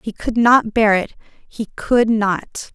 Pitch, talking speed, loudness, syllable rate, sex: 220 Hz, 155 wpm, -16 LUFS, 3.4 syllables/s, female